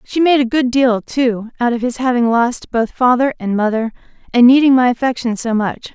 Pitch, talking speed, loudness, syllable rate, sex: 245 Hz, 210 wpm, -15 LUFS, 5.2 syllables/s, female